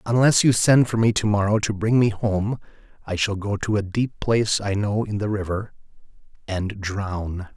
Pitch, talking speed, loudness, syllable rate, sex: 105 Hz, 200 wpm, -22 LUFS, 4.7 syllables/s, male